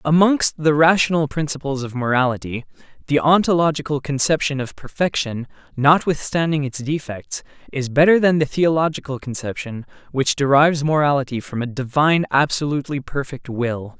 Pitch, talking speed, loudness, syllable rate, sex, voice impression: 145 Hz, 125 wpm, -19 LUFS, 5.3 syllables/s, male, very masculine, very adult-like, slightly thick, tensed, slightly powerful, bright, slightly soft, clear, fluent, slightly raspy, cool, intellectual, very refreshing, sincere, calm, slightly mature, very friendly, reassuring, unique, elegant, slightly wild, sweet, lively, kind